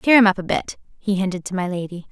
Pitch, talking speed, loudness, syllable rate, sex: 190 Hz, 285 wpm, -21 LUFS, 6.7 syllables/s, female